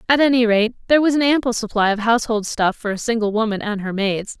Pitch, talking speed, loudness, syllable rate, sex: 225 Hz, 245 wpm, -18 LUFS, 6.5 syllables/s, female